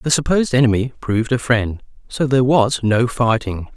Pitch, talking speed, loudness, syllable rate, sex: 120 Hz, 175 wpm, -17 LUFS, 5.4 syllables/s, male